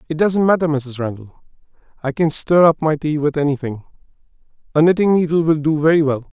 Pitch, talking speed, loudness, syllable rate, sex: 155 Hz, 180 wpm, -17 LUFS, 5.8 syllables/s, male